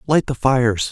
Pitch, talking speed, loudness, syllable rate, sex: 125 Hz, 195 wpm, -18 LUFS, 5.3 syllables/s, male